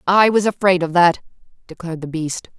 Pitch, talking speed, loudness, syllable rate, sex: 175 Hz, 185 wpm, -17 LUFS, 5.6 syllables/s, female